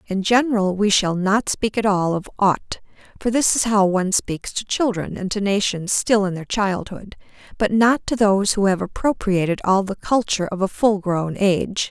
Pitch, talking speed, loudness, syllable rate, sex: 200 Hz, 200 wpm, -20 LUFS, 4.9 syllables/s, female